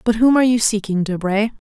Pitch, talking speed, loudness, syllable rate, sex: 215 Hz, 210 wpm, -17 LUFS, 6.3 syllables/s, female